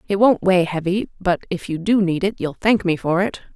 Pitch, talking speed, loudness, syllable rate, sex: 185 Hz, 255 wpm, -19 LUFS, 5.3 syllables/s, female